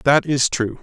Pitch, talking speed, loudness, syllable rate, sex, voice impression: 135 Hz, 220 wpm, -18 LUFS, 4.2 syllables/s, male, very masculine, very adult-like, slightly thick, tensed, slightly powerful, bright, soft, clear, fluent, slightly raspy, cool, very intellectual, very refreshing, sincere, calm, slightly mature, friendly, reassuring, unique, elegant, slightly wild, sweet, lively, kind, slightly modest